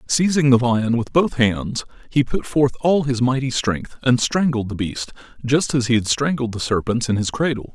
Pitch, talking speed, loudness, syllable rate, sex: 125 Hz, 210 wpm, -20 LUFS, 4.8 syllables/s, male